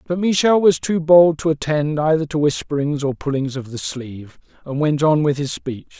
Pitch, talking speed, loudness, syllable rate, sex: 150 Hz, 210 wpm, -18 LUFS, 5.1 syllables/s, male